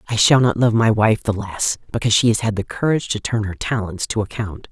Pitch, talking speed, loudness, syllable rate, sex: 110 Hz, 255 wpm, -19 LUFS, 5.9 syllables/s, female